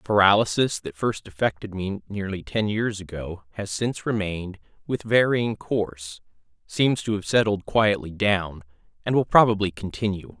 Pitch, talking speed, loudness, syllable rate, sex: 100 Hz, 145 wpm, -24 LUFS, 5.3 syllables/s, male